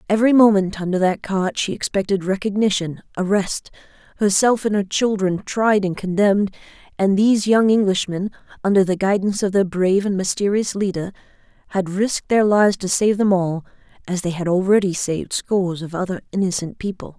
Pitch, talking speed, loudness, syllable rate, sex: 195 Hz, 165 wpm, -19 LUFS, 5.6 syllables/s, female